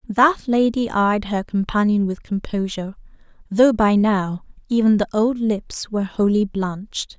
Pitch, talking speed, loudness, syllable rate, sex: 210 Hz, 140 wpm, -20 LUFS, 4.4 syllables/s, female